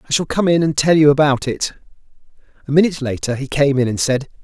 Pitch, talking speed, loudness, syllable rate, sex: 145 Hz, 230 wpm, -16 LUFS, 6.4 syllables/s, male